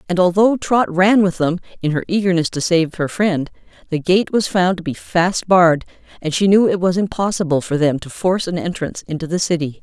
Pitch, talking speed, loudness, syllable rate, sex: 175 Hz, 220 wpm, -17 LUFS, 5.6 syllables/s, female